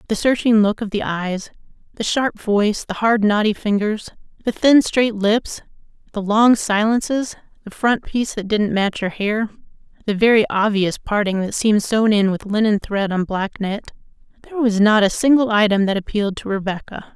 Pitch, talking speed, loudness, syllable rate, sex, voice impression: 210 Hz, 180 wpm, -18 LUFS, 5.1 syllables/s, female, feminine, adult-like, thin, tensed, powerful, bright, clear, fluent, intellectual, friendly, lively, slightly strict